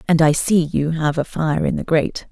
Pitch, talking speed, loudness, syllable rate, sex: 160 Hz, 260 wpm, -18 LUFS, 5.1 syllables/s, female